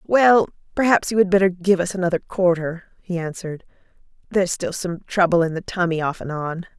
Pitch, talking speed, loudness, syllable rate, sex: 180 Hz, 185 wpm, -20 LUFS, 5.7 syllables/s, female